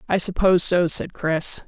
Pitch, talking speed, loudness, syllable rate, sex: 175 Hz, 180 wpm, -18 LUFS, 4.7 syllables/s, female